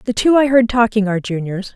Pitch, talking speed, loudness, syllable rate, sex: 220 Hz, 240 wpm, -15 LUFS, 5.9 syllables/s, female